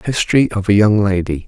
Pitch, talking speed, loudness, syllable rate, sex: 100 Hz, 205 wpm, -14 LUFS, 5.6 syllables/s, male